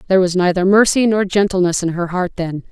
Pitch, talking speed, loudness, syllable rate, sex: 185 Hz, 220 wpm, -16 LUFS, 6.2 syllables/s, female